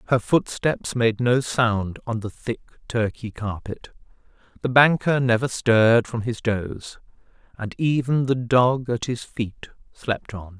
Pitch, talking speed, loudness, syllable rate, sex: 115 Hz, 145 wpm, -22 LUFS, 4.1 syllables/s, male